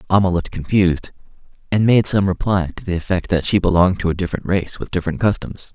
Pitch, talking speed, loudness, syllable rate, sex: 90 Hz, 210 wpm, -18 LUFS, 6.7 syllables/s, male